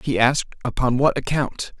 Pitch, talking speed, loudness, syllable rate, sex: 130 Hz, 165 wpm, -21 LUFS, 5.5 syllables/s, male